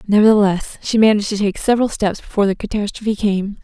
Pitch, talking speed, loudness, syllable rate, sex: 205 Hz, 180 wpm, -17 LUFS, 6.7 syllables/s, female